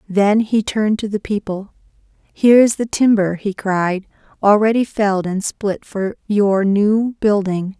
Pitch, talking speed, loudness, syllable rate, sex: 205 Hz, 155 wpm, -17 LUFS, 4.3 syllables/s, female